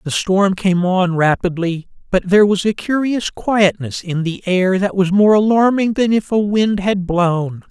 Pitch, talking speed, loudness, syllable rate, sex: 190 Hz, 185 wpm, -16 LUFS, 4.3 syllables/s, male